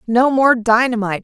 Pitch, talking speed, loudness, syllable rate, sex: 235 Hz, 145 wpm, -14 LUFS, 5.3 syllables/s, female